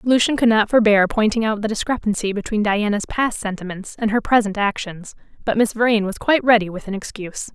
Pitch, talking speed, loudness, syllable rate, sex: 215 Hz, 200 wpm, -19 LUFS, 5.8 syllables/s, female